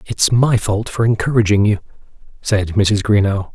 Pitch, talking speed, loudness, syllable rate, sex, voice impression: 105 Hz, 150 wpm, -16 LUFS, 4.6 syllables/s, male, very masculine, very adult-like, old, very thick, slightly relaxed, very powerful, dark, slightly soft, muffled, fluent, raspy, very cool, very intellectual, sincere, very calm, very mature, very friendly, very reassuring, very unique, slightly elegant, very wild, slightly sweet, slightly lively, very kind, slightly modest